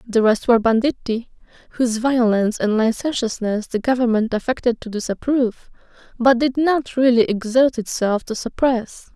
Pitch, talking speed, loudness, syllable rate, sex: 240 Hz, 140 wpm, -19 LUFS, 5.1 syllables/s, female